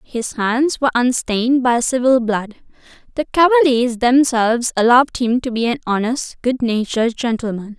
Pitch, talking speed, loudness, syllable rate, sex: 245 Hz, 140 wpm, -16 LUFS, 5.1 syllables/s, female